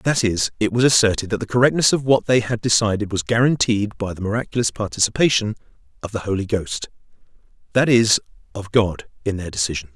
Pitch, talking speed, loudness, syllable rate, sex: 110 Hz, 180 wpm, -19 LUFS, 6.0 syllables/s, male